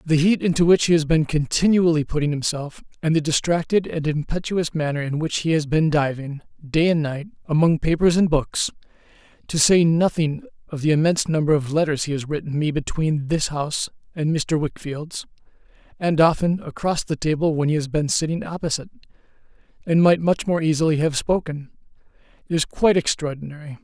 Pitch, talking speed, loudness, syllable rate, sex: 155 Hz, 175 wpm, -21 LUFS, 5.5 syllables/s, male